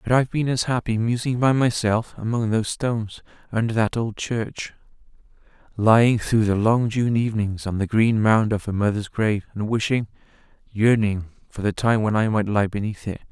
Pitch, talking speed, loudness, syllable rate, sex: 110 Hz, 180 wpm, -22 LUFS, 5.2 syllables/s, male